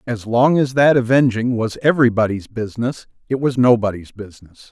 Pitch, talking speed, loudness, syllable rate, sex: 120 Hz, 155 wpm, -17 LUFS, 5.5 syllables/s, male